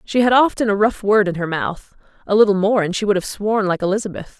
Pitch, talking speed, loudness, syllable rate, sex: 205 Hz, 260 wpm, -17 LUFS, 6.0 syllables/s, female